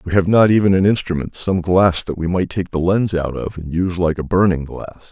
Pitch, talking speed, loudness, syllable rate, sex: 90 Hz, 260 wpm, -17 LUFS, 5.4 syllables/s, male